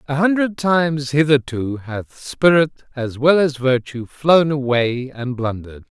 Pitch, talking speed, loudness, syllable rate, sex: 140 Hz, 140 wpm, -18 LUFS, 4.2 syllables/s, male